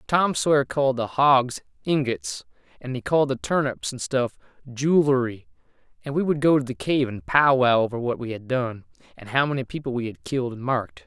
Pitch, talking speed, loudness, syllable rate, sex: 130 Hz, 200 wpm, -23 LUFS, 5.4 syllables/s, male